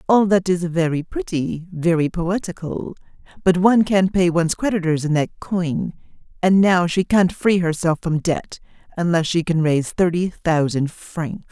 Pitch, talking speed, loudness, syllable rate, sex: 175 Hz, 160 wpm, -19 LUFS, 4.6 syllables/s, female